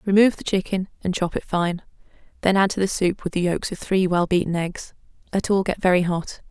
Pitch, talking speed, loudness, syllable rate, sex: 185 Hz, 230 wpm, -22 LUFS, 5.7 syllables/s, female